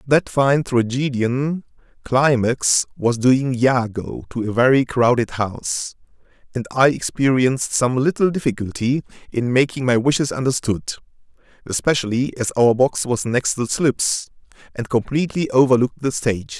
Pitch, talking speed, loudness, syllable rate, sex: 125 Hz, 130 wpm, -19 LUFS, 4.7 syllables/s, male